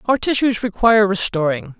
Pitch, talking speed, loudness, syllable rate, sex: 210 Hz, 135 wpm, -17 LUFS, 5.3 syllables/s, female